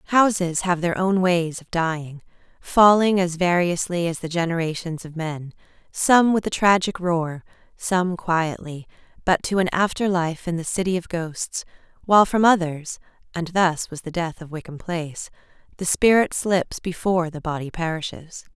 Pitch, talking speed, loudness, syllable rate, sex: 175 Hz, 155 wpm, -22 LUFS, 4.7 syllables/s, female